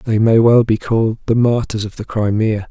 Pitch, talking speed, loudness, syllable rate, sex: 110 Hz, 220 wpm, -15 LUFS, 5.0 syllables/s, male